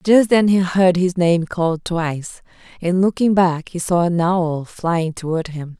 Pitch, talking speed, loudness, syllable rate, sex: 175 Hz, 185 wpm, -18 LUFS, 4.2 syllables/s, female